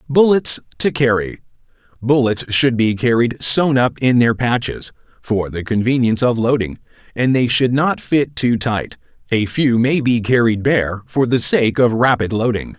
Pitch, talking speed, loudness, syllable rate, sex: 120 Hz, 165 wpm, -16 LUFS, 4.5 syllables/s, male